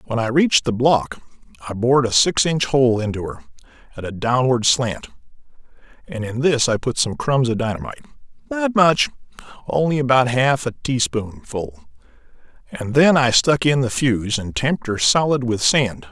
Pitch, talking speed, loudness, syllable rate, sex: 125 Hz, 165 wpm, -18 LUFS, 5.0 syllables/s, male